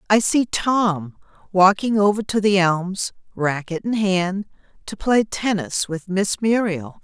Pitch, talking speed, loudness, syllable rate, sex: 195 Hz, 145 wpm, -20 LUFS, 3.7 syllables/s, female